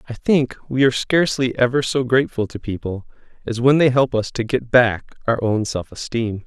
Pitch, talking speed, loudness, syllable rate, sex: 120 Hz, 205 wpm, -19 LUFS, 5.4 syllables/s, male